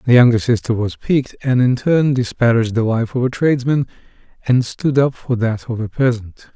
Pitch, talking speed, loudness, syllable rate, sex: 120 Hz, 200 wpm, -17 LUFS, 5.4 syllables/s, male